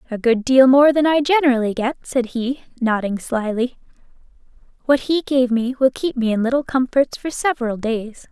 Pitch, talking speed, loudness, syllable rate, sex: 250 Hz, 180 wpm, -18 LUFS, 5.1 syllables/s, female